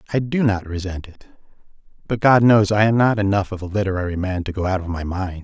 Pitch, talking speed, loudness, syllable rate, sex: 100 Hz, 245 wpm, -19 LUFS, 6.2 syllables/s, male